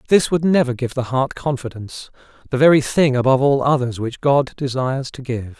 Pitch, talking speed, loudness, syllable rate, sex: 135 Hz, 180 wpm, -18 LUFS, 5.6 syllables/s, male